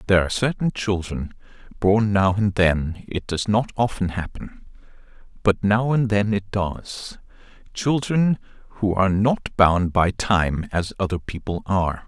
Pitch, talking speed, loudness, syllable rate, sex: 100 Hz, 140 wpm, -22 LUFS, 4.3 syllables/s, male